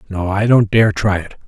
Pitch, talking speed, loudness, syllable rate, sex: 100 Hz, 245 wpm, -15 LUFS, 5.0 syllables/s, male